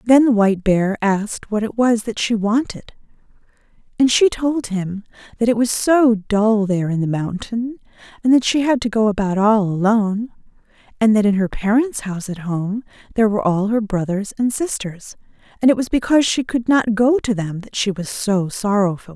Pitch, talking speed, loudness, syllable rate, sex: 215 Hz, 195 wpm, -18 LUFS, 5.2 syllables/s, female